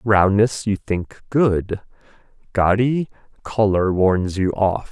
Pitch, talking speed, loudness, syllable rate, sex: 100 Hz, 110 wpm, -19 LUFS, 3.3 syllables/s, male